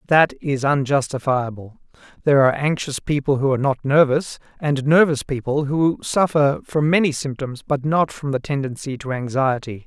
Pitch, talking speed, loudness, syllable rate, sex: 140 Hz, 160 wpm, -20 LUFS, 5.1 syllables/s, male